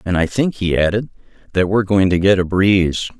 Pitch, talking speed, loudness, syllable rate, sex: 95 Hz, 225 wpm, -16 LUFS, 5.9 syllables/s, male